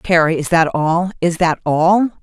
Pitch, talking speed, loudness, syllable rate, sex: 170 Hz, 160 wpm, -15 LUFS, 4.1 syllables/s, female